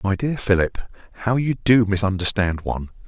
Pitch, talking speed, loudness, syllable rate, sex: 105 Hz, 155 wpm, -21 LUFS, 5.3 syllables/s, male